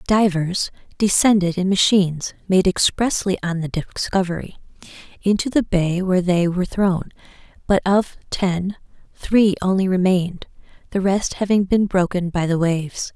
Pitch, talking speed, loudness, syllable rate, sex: 185 Hz, 135 wpm, -19 LUFS, 4.7 syllables/s, female